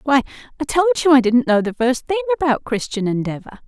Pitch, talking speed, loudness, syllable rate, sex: 270 Hz, 215 wpm, -18 LUFS, 6.5 syllables/s, female